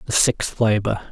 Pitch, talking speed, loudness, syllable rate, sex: 105 Hz, 160 wpm, -20 LUFS, 4.4 syllables/s, male